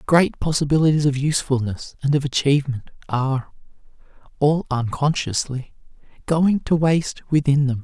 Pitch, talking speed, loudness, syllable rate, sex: 145 Hz, 115 wpm, -21 LUFS, 5.2 syllables/s, male